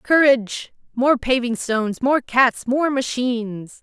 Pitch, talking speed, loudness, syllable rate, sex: 250 Hz, 125 wpm, -19 LUFS, 3.9 syllables/s, female